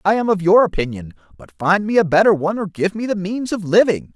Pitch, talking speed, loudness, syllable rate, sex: 185 Hz, 260 wpm, -17 LUFS, 6.0 syllables/s, male